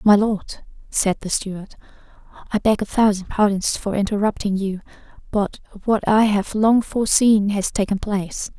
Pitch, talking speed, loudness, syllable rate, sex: 205 Hz, 155 wpm, -20 LUFS, 4.8 syllables/s, female